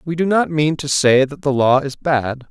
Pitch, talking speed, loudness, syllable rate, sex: 145 Hz, 265 wpm, -17 LUFS, 4.6 syllables/s, male